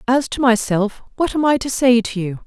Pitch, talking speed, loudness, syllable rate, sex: 240 Hz, 245 wpm, -18 LUFS, 5.1 syllables/s, female